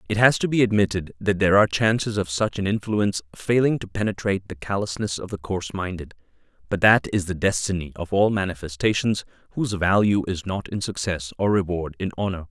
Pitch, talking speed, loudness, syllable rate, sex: 100 Hz, 190 wpm, -23 LUFS, 6.0 syllables/s, male